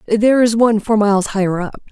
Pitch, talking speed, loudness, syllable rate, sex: 215 Hz, 220 wpm, -15 LUFS, 6.5 syllables/s, female